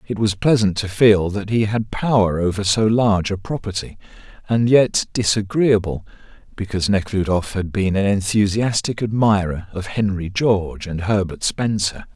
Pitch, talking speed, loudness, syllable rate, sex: 100 Hz, 150 wpm, -19 LUFS, 4.8 syllables/s, male